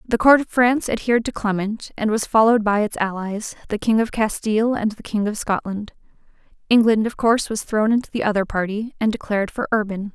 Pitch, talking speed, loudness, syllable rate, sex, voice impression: 215 Hz, 205 wpm, -20 LUFS, 5.9 syllables/s, female, feminine, adult-like, tensed, powerful, clear, fluent, intellectual, elegant, lively, sharp